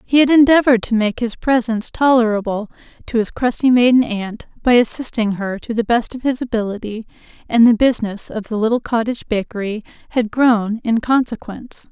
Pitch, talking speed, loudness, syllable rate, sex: 230 Hz, 170 wpm, -17 LUFS, 5.6 syllables/s, female